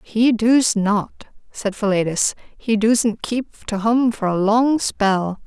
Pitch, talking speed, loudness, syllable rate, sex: 220 Hz, 145 wpm, -19 LUFS, 3.2 syllables/s, female